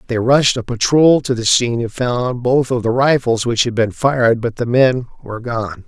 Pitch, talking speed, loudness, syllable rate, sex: 120 Hz, 225 wpm, -15 LUFS, 4.9 syllables/s, male